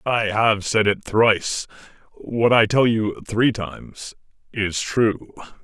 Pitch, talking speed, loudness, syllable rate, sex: 110 Hz, 140 wpm, -20 LUFS, 3.6 syllables/s, male